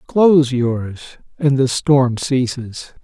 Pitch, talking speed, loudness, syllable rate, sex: 135 Hz, 120 wpm, -16 LUFS, 3.3 syllables/s, male